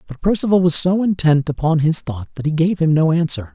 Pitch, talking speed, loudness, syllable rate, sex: 160 Hz, 235 wpm, -17 LUFS, 5.8 syllables/s, male